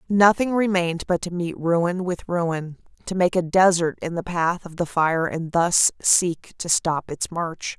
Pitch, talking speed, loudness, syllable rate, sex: 175 Hz, 195 wpm, -22 LUFS, 4.0 syllables/s, female